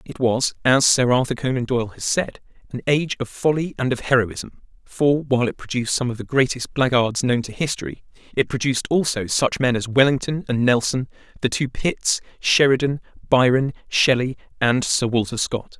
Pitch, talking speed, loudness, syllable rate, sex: 130 Hz, 180 wpm, -20 LUFS, 5.3 syllables/s, male